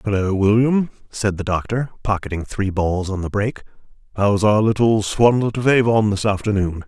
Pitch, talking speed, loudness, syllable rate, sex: 105 Hz, 165 wpm, -19 LUFS, 5.0 syllables/s, male